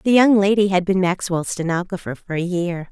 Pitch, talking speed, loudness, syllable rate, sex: 185 Hz, 205 wpm, -19 LUFS, 5.4 syllables/s, female